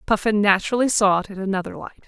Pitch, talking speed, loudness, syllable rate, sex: 205 Hz, 205 wpm, -20 LUFS, 7.1 syllables/s, female